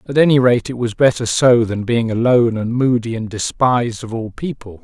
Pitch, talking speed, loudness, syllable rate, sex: 120 Hz, 210 wpm, -16 LUFS, 5.3 syllables/s, male